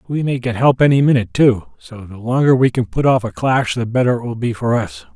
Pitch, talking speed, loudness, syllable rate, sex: 120 Hz, 270 wpm, -16 LUFS, 5.8 syllables/s, male